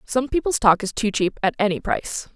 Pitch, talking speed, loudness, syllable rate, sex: 220 Hz, 230 wpm, -21 LUFS, 5.6 syllables/s, female